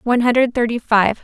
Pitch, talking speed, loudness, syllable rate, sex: 235 Hz, 195 wpm, -16 LUFS, 6.2 syllables/s, female